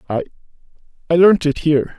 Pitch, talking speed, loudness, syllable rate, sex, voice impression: 155 Hz, 150 wpm, -16 LUFS, 6.4 syllables/s, male, masculine, middle-aged, thick, slightly tensed, powerful, slightly soft, slightly muffled, cool, intellectual, calm, mature, reassuring, wild, lively, kind